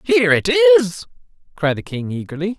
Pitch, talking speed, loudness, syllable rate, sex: 210 Hz, 160 wpm, -17 LUFS, 5.0 syllables/s, male